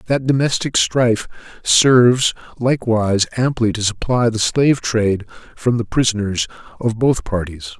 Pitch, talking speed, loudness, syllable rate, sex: 115 Hz, 130 wpm, -17 LUFS, 4.9 syllables/s, male